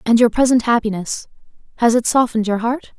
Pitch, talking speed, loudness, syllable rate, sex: 230 Hz, 180 wpm, -17 LUFS, 6.2 syllables/s, female